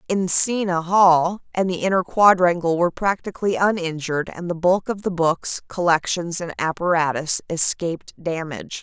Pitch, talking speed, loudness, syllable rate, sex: 175 Hz, 135 wpm, -20 LUFS, 4.9 syllables/s, female